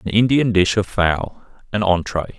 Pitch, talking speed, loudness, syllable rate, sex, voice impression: 100 Hz, 175 wpm, -18 LUFS, 4.4 syllables/s, male, masculine, adult-like, thick, tensed, slightly powerful, slightly muffled, fluent, cool, intellectual, calm, reassuring, wild, lively, slightly strict